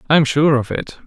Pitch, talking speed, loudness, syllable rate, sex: 145 Hz, 280 wpm, -17 LUFS, 6.2 syllables/s, male